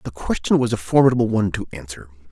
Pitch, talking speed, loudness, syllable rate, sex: 100 Hz, 210 wpm, -19 LUFS, 7.2 syllables/s, male